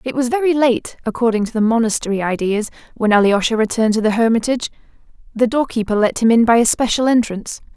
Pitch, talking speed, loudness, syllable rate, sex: 230 Hz, 195 wpm, -16 LUFS, 6.5 syllables/s, female